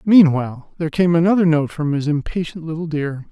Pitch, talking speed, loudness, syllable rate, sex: 160 Hz, 180 wpm, -18 LUFS, 5.8 syllables/s, male